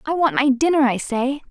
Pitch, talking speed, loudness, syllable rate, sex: 270 Hz, 240 wpm, -19 LUFS, 5.4 syllables/s, female